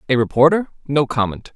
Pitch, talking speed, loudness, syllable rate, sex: 135 Hz, 155 wpm, -18 LUFS, 5.9 syllables/s, male